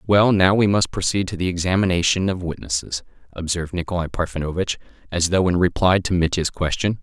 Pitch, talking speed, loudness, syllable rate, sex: 90 Hz, 170 wpm, -20 LUFS, 5.9 syllables/s, male